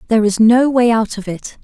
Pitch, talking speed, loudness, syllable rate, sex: 225 Hz, 260 wpm, -14 LUFS, 5.6 syllables/s, female